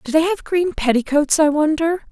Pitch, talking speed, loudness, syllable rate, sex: 310 Hz, 200 wpm, -18 LUFS, 5.2 syllables/s, female